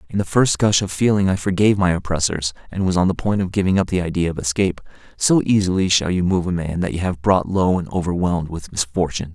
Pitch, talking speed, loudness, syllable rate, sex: 90 Hz, 245 wpm, -19 LUFS, 6.4 syllables/s, male